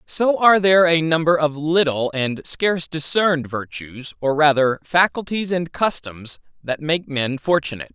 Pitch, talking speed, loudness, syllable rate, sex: 150 Hz, 150 wpm, -19 LUFS, 4.7 syllables/s, male